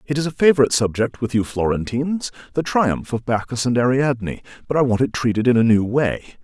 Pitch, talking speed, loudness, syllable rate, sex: 125 Hz, 205 wpm, -19 LUFS, 6.1 syllables/s, male